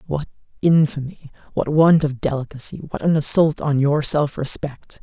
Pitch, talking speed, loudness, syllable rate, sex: 145 Hz, 155 wpm, -19 LUFS, 4.7 syllables/s, male